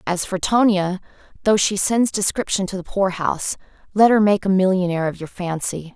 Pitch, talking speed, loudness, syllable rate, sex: 190 Hz, 180 wpm, -19 LUFS, 5.4 syllables/s, female